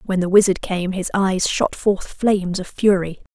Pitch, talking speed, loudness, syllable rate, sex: 190 Hz, 195 wpm, -19 LUFS, 4.5 syllables/s, female